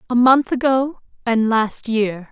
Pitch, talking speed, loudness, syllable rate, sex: 235 Hz, 155 wpm, -18 LUFS, 3.7 syllables/s, female